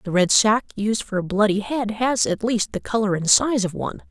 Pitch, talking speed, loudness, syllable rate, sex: 215 Hz, 250 wpm, -20 LUFS, 5.2 syllables/s, female